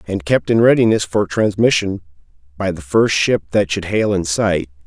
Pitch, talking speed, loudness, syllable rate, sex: 95 Hz, 185 wpm, -16 LUFS, 4.9 syllables/s, male